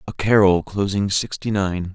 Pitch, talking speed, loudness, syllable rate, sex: 95 Hz, 155 wpm, -19 LUFS, 4.5 syllables/s, male